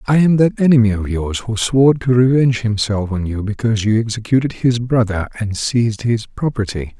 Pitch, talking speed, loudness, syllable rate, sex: 115 Hz, 190 wpm, -16 LUFS, 5.5 syllables/s, male